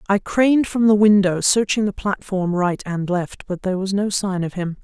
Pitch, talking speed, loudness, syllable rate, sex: 195 Hz, 225 wpm, -19 LUFS, 5.0 syllables/s, female